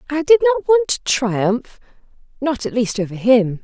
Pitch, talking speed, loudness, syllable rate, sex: 260 Hz, 165 wpm, -17 LUFS, 4.6 syllables/s, female